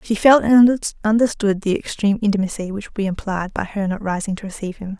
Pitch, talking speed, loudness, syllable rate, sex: 205 Hz, 215 wpm, -19 LUFS, 6.1 syllables/s, female